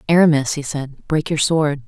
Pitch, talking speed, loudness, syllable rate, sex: 150 Hz, 190 wpm, -18 LUFS, 4.7 syllables/s, female